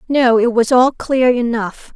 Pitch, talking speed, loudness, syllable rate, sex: 245 Hz, 185 wpm, -14 LUFS, 4.0 syllables/s, female